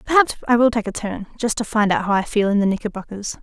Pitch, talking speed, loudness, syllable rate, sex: 215 Hz, 265 wpm, -20 LUFS, 6.5 syllables/s, female